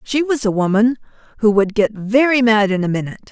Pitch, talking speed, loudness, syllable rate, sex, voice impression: 220 Hz, 215 wpm, -16 LUFS, 6.0 syllables/s, female, feminine, slightly gender-neutral, very middle-aged, slightly thin, tensed, powerful, slightly dark, hard, clear, fluent, slightly raspy, cool, very intellectual, refreshing, sincere, calm, very friendly, reassuring, very unique, elegant, wild, slightly sweet, lively, slightly kind, slightly intense